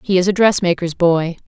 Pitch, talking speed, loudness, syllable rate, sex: 180 Hz, 205 wpm, -16 LUFS, 5.4 syllables/s, female